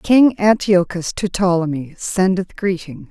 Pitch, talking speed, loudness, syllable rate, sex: 185 Hz, 115 wpm, -17 LUFS, 4.0 syllables/s, female